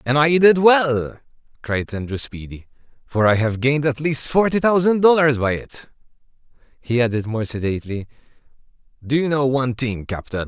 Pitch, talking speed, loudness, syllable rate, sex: 130 Hz, 160 wpm, -19 LUFS, 5.1 syllables/s, male